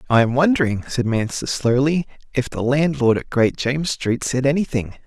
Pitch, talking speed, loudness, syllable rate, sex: 130 Hz, 180 wpm, -20 LUFS, 5.2 syllables/s, male